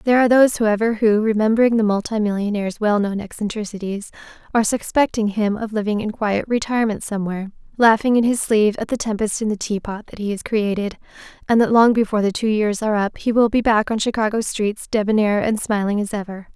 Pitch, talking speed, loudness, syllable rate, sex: 215 Hz, 200 wpm, -19 LUFS, 6.4 syllables/s, female